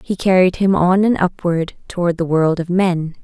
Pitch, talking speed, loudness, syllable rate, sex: 180 Hz, 205 wpm, -16 LUFS, 4.7 syllables/s, female